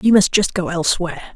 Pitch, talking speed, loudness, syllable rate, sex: 185 Hz, 220 wpm, -18 LUFS, 6.9 syllables/s, female